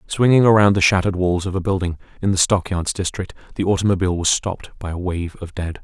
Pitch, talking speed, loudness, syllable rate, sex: 95 Hz, 215 wpm, -19 LUFS, 6.4 syllables/s, male